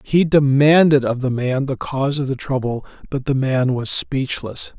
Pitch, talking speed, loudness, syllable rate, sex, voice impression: 135 Hz, 190 wpm, -18 LUFS, 4.5 syllables/s, male, very masculine, slightly old, very thick, relaxed, powerful, slightly dark, slightly soft, slightly muffled, fluent, cool, very intellectual, slightly refreshing, sincere, calm, mature, friendly, reassuring, unique, elegant, wild, sweet, slightly lively, kind, modest